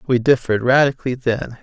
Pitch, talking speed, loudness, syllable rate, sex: 125 Hz, 145 wpm, -17 LUFS, 6.1 syllables/s, male